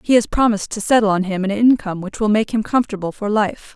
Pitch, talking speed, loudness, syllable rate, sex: 210 Hz, 255 wpm, -18 LUFS, 6.6 syllables/s, female